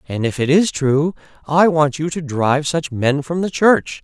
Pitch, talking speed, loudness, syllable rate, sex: 150 Hz, 225 wpm, -17 LUFS, 4.5 syllables/s, male